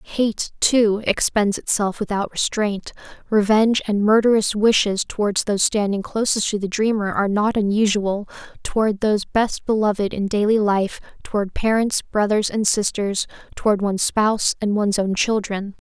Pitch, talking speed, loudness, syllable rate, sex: 210 Hz, 150 wpm, -20 LUFS, 4.9 syllables/s, female